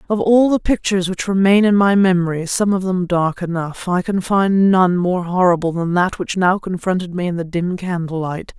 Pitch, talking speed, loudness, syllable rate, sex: 185 Hz, 215 wpm, -17 LUFS, 5.0 syllables/s, female